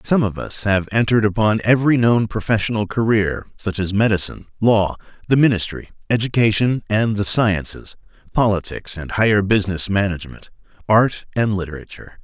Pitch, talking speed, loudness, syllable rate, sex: 105 Hz, 135 wpm, -18 LUFS, 5.5 syllables/s, male